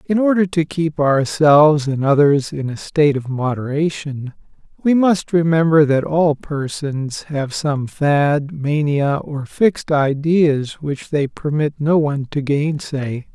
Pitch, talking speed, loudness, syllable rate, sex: 150 Hz, 145 wpm, -17 LUFS, 3.9 syllables/s, male